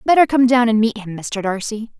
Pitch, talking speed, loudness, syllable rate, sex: 225 Hz, 240 wpm, -17 LUFS, 5.5 syllables/s, female